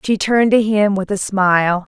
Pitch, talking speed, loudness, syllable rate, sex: 200 Hz, 215 wpm, -15 LUFS, 5.1 syllables/s, female